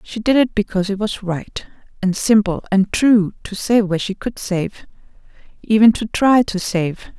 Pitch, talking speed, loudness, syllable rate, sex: 205 Hz, 185 wpm, -17 LUFS, 4.7 syllables/s, female